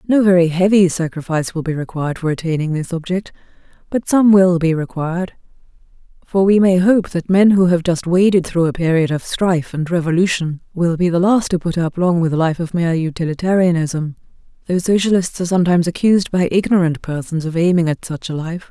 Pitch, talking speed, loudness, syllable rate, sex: 175 Hz, 195 wpm, -16 LUFS, 5.9 syllables/s, female